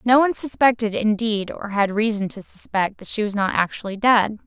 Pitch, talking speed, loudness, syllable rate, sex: 215 Hz, 200 wpm, -21 LUFS, 5.4 syllables/s, female